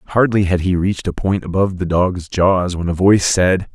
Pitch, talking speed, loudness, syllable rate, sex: 90 Hz, 225 wpm, -16 LUFS, 5.4 syllables/s, male